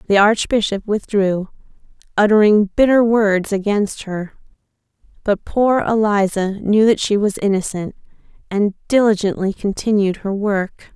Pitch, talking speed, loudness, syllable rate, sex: 205 Hz, 115 wpm, -17 LUFS, 4.4 syllables/s, female